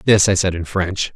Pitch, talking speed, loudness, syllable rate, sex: 95 Hz, 260 wpm, -17 LUFS, 5.0 syllables/s, male